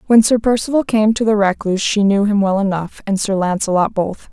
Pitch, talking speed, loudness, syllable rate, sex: 205 Hz, 220 wpm, -16 LUFS, 5.8 syllables/s, female